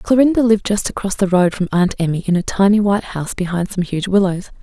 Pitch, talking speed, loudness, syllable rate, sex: 195 Hz, 235 wpm, -17 LUFS, 6.3 syllables/s, female